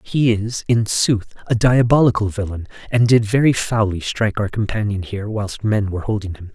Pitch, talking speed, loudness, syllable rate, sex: 110 Hz, 185 wpm, -18 LUFS, 5.3 syllables/s, male